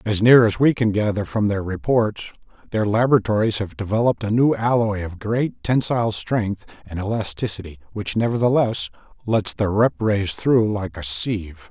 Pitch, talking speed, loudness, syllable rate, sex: 105 Hz, 165 wpm, -20 LUFS, 5.0 syllables/s, male